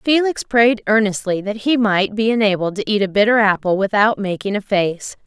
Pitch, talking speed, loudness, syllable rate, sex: 210 Hz, 195 wpm, -17 LUFS, 5.1 syllables/s, female